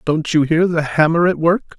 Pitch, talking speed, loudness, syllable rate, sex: 160 Hz, 235 wpm, -16 LUFS, 4.7 syllables/s, male